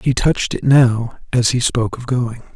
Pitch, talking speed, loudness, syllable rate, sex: 120 Hz, 210 wpm, -17 LUFS, 4.8 syllables/s, male